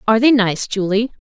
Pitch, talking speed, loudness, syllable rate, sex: 215 Hz, 190 wpm, -16 LUFS, 6.0 syllables/s, female